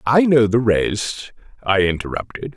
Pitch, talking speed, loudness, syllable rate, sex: 110 Hz, 140 wpm, -18 LUFS, 4.3 syllables/s, male